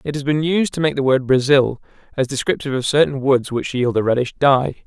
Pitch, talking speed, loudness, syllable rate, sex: 135 Hz, 235 wpm, -18 LUFS, 5.7 syllables/s, male